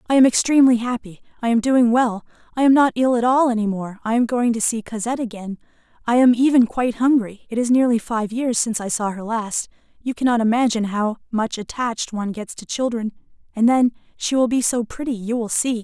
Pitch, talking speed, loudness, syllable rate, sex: 235 Hz, 220 wpm, -20 LUFS, 6.0 syllables/s, female